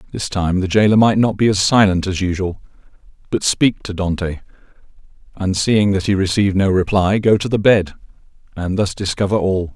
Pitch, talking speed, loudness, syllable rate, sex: 100 Hz, 185 wpm, -17 LUFS, 5.4 syllables/s, male